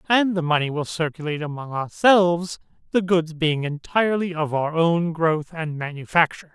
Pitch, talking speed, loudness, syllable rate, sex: 165 Hz, 165 wpm, -22 LUFS, 5.1 syllables/s, male